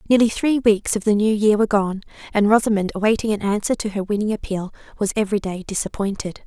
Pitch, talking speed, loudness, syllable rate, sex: 210 Hz, 205 wpm, -20 LUFS, 6.5 syllables/s, female